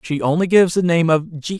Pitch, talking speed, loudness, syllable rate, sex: 165 Hz, 265 wpm, -16 LUFS, 6.0 syllables/s, male